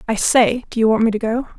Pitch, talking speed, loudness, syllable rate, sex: 225 Hz, 265 wpm, -17 LUFS, 6.1 syllables/s, female